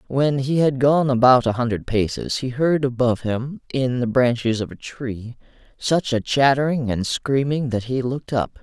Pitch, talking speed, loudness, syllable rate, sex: 130 Hz, 190 wpm, -20 LUFS, 4.7 syllables/s, male